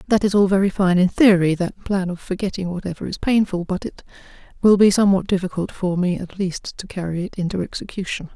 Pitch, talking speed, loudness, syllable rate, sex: 190 Hz, 210 wpm, -20 LUFS, 5.9 syllables/s, female